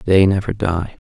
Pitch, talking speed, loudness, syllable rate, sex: 95 Hz, 165 wpm, -18 LUFS, 4.2 syllables/s, male